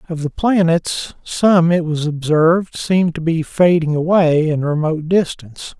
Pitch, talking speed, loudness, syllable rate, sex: 165 Hz, 155 wpm, -16 LUFS, 4.5 syllables/s, male